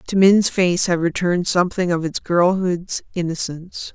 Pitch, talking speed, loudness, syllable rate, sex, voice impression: 175 Hz, 150 wpm, -19 LUFS, 4.9 syllables/s, female, feminine, very adult-like, intellectual